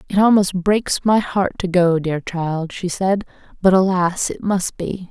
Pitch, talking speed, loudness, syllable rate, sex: 185 Hz, 190 wpm, -18 LUFS, 4.0 syllables/s, female